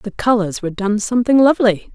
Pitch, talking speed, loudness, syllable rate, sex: 220 Hz, 185 wpm, -16 LUFS, 6.3 syllables/s, female